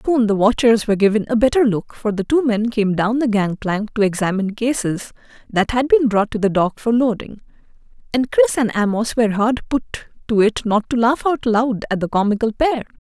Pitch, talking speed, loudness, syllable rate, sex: 225 Hz, 210 wpm, -18 LUFS, 5.5 syllables/s, female